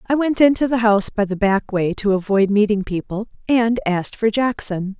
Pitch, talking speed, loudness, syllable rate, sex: 215 Hz, 205 wpm, -18 LUFS, 5.2 syllables/s, female